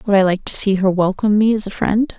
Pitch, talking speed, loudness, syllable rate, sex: 200 Hz, 300 wpm, -16 LUFS, 6.3 syllables/s, female